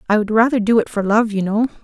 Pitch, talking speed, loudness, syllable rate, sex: 220 Hz, 295 wpm, -17 LUFS, 6.7 syllables/s, female